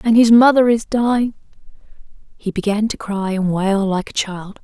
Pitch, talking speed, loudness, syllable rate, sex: 210 Hz, 180 wpm, -16 LUFS, 4.9 syllables/s, female